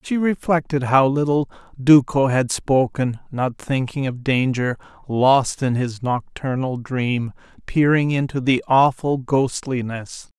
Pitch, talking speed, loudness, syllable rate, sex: 130 Hz, 120 wpm, -20 LUFS, 3.8 syllables/s, male